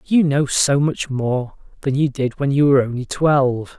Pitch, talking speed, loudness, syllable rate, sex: 140 Hz, 205 wpm, -18 LUFS, 4.7 syllables/s, male